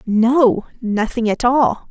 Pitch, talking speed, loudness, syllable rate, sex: 230 Hz, 125 wpm, -16 LUFS, 3.1 syllables/s, female